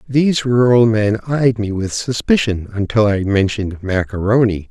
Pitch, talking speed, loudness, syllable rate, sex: 110 Hz, 155 wpm, -16 LUFS, 4.7 syllables/s, male